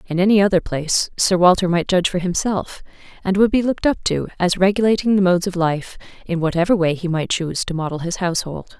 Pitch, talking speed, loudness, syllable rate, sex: 185 Hz, 220 wpm, -18 LUFS, 6.3 syllables/s, female